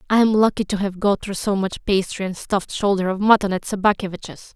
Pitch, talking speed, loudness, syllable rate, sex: 200 Hz, 225 wpm, -20 LUFS, 6.0 syllables/s, female